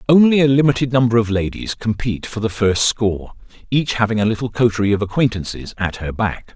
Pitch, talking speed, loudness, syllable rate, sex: 110 Hz, 190 wpm, -18 LUFS, 6.0 syllables/s, male